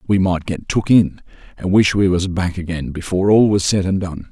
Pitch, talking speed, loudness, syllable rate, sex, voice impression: 95 Hz, 235 wpm, -17 LUFS, 5.2 syllables/s, male, very masculine, very adult-like, very middle-aged, very thick, slightly tensed, very powerful, bright, hard, muffled, fluent, slightly raspy, very cool, very intellectual, sincere, very calm, very mature, very friendly, reassuring, very unique, very elegant, sweet, kind